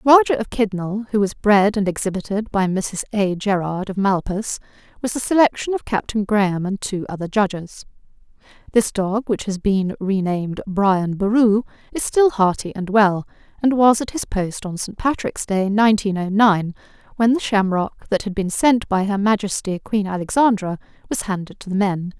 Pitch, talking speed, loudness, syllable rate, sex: 205 Hz, 180 wpm, -20 LUFS, 4.9 syllables/s, female